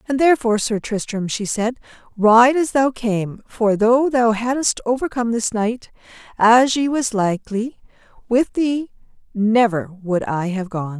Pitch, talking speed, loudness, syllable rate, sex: 225 Hz, 155 wpm, -18 LUFS, 4.4 syllables/s, female